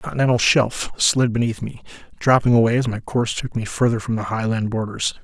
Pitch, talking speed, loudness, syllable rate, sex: 115 Hz, 205 wpm, -20 LUFS, 5.9 syllables/s, male